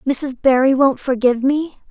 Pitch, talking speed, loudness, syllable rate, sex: 265 Hz, 160 wpm, -16 LUFS, 4.8 syllables/s, female